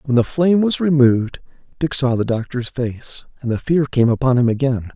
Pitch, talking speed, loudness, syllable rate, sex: 130 Hz, 205 wpm, -18 LUFS, 5.4 syllables/s, male